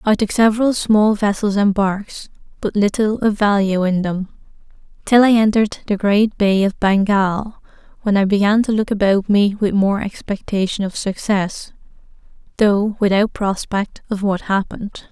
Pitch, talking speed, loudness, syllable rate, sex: 205 Hz, 155 wpm, -17 LUFS, 4.6 syllables/s, female